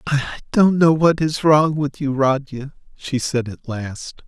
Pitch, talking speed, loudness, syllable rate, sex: 140 Hz, 185 wpm, -18 LUFS, 3.9 syllables/s, male